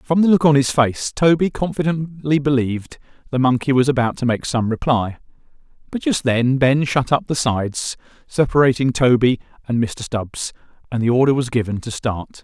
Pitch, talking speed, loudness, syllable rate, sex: 130 Hz, 180 wpm, -18 LUFS, 5.1 syllables/s, male